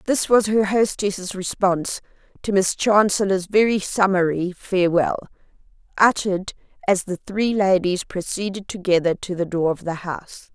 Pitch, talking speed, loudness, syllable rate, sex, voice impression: 190 Hz, 135 wpm, -21 LUFS, 4.6 syllables/s, female, feminine, middle-aged, slightly muffled, sincere, slightly calm, elegant